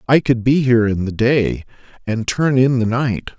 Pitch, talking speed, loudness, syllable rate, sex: 120 Hz, 215 wpm, -17 LUFS, 4.7 syllables/s, male